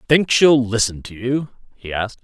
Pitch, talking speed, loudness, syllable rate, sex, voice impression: 120 Hz, 190 wpm, -18 LUFS, 4.9 syllables/s, male, masculine, adult-like, slightly clear, slightly refreshing, slightly sincere, friendly